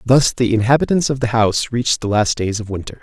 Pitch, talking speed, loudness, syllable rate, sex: 115 Hz, 240 wpm, -17 LUFS, 6.1 syllables/s, male